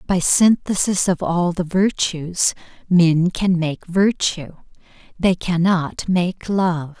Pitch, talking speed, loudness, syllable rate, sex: 175 Hz, 120 wpm, -18 LUFS, 3.2 syllables/s, female